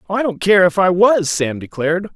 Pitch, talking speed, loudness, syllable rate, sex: 185 Hz, 225 wpm, -15 LUFS, 5.2 syllables/s, male